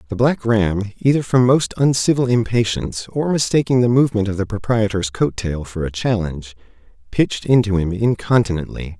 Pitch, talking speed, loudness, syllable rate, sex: 110 Hz, 160 wpm, -18 LUFS, 5.5 syllables/s, male